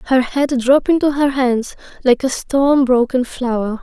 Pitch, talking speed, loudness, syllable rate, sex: 260 Hz, 170 wpm, -16 LUFS, 4.3 syllables/s, female